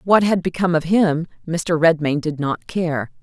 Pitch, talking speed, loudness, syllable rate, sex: 165 Hz, 185 wpm, -19 LUFS, 4.6 syllables/s, female